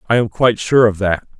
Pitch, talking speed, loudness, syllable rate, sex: 110 Hz, 260 wpm, -15 LUFS, 6.3 syllables/s, male